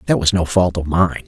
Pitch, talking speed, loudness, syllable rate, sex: 90 Hz, 285 wpm, -17 LUFS, 5.5 syllables/s, male